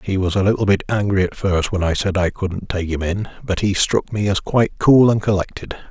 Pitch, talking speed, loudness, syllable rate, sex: 100 Hz, 255 wpm, -18 LUFS, 5.5 syllables/s, male